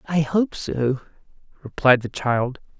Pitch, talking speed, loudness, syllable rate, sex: 140 Hz, 130 wpm, -22 LUFS, 3.7 syllables/s, male